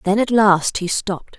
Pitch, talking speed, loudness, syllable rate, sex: 200 Hz, 215 wpm, -17 LUFS, 4.7 syllables/s, female